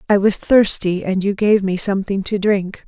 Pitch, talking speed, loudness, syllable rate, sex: 195 Hz, 210 wpm, -17 LUFS, 4.9 syllables/s, female